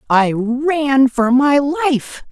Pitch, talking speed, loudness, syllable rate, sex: 270 Hz, 130 wpm, -15 LUFS, 2.5 syllables/s, female